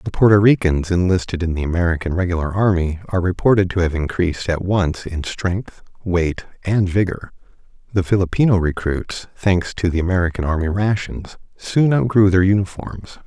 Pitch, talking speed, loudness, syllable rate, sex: 90 Hz, 155 wpm, -18 LUFS, 5.2 syllables/s, male